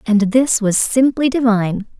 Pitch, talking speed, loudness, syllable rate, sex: 230 Hz, 150 wpm, -15 LUFS, 4.5 syllables/s, female